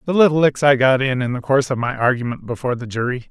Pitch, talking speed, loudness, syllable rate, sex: 130 Hz, 270 wpm, -18 LUFS, 7.0 syllables/s, male